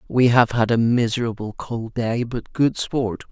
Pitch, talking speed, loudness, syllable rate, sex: 115 Hz, 180 wpm, -21 LUFS, 4.2 syllables/s, male